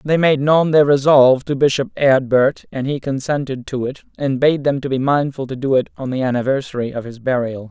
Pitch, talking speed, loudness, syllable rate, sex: 135 Hz, 220 wpm, -17 LUFS, 5.5 syllables/s, male